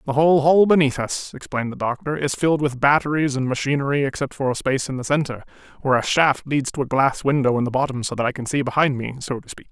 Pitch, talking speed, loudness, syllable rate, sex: 135 Hz, 260 wpm, -21 LUFS, 6.6 syllables/s, male